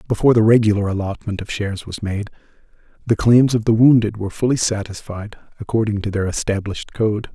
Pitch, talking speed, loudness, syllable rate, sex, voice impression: 105 Hz, 170 wpm, -18 LUFS, 6.2 syllables/s, male, masculine, adult-like, relaxed, powerful, slightly soft, slightly muffled, intellectual, sincere, calm, reassuring, wild, slightly strict